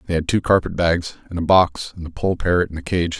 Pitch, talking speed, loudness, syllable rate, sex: 85 Hz, 280 wpm, -20 LUFS, 5.9 syllables/s, male